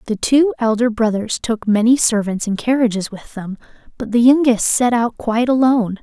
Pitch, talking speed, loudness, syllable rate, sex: 230 Hz, 180 wpm, -16 LUFS, 5.2 syllables/s, female